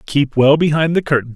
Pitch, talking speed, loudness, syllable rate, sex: 145 Hz, 220 wpm, -15 LUFS, 5.7 syllables/s, male